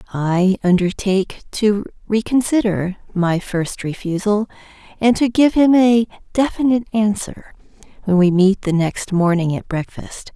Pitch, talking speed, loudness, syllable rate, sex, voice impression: 205 Hz, 130 wpm, -17 LUFS, 4.4 syllables/s, female, very feminine, adult-like, thin, slightly relaxed, slightly weak, slightly dark, soft, clear, fluent, very cute, intellectual, refreshing, very sincere, calm, friendly, very reassuring, very unique, very elegant, slightly wild, very sweet, slightly lively, very kind, very modest, light